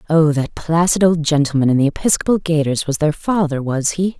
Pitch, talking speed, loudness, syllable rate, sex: 160 Hz, 200 wpm, -17 LUFS, 5.5 syllables/s, female